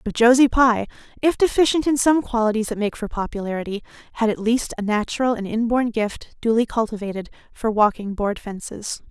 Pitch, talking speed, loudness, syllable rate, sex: 225 Hz, 170 wpm, -21 LUFS, 5.6 syllables/s, female